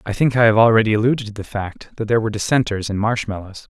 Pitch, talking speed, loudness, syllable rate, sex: 110 Hz, 240 wpm, -18 LUFS, 7.1 syllables/s, male